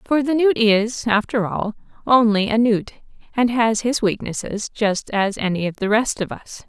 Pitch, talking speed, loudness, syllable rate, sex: 220 Hz, 190 wpm, -19 LUFS, 4.5 syllables/s, female